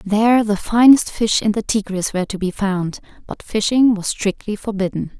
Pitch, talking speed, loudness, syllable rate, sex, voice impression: 210 Hz, 185 wpm, -17 LUFS, 5.0 syllables/s, female, feminine, slightly adult-like, fluent, cute, slightly calm, friendly, kind